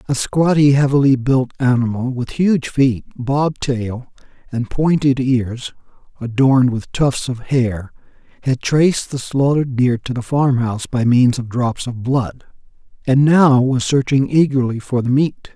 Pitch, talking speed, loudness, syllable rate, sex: 130 Hz, 155 wpm, -17 LUFS, 4.3 syllables/s, male